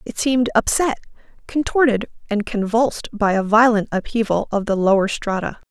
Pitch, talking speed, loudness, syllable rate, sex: 220 Hz, 145 wpm, -19 LUFS, 5.4 syllables/s, female